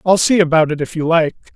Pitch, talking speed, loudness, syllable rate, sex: 165 Hz, 270 wpm, -15 LUFS, 6.4 syllables/s, male